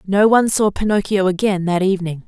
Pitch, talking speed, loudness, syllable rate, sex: 195 Hz, 185 wpm, -17 LUFS, 6.1 syllables/s, female